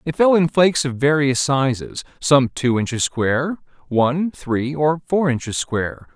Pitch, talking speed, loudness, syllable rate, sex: 140 Hz, 165 wpm, -19 LUFS, 4.6 syllables/s, male